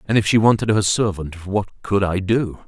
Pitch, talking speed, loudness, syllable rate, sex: 100 Hz, 225 wpm, -19 LUFS, 5.1 syllables/s, male